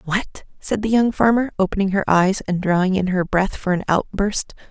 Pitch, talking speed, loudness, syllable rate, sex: 195 Hz, 205 wpm, -19 LUFS, 5.1 syllables/s, female